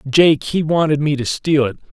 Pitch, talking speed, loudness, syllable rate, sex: 145 Hz, 210 wpm, -16 LUFS, 4.7 syllables/s, male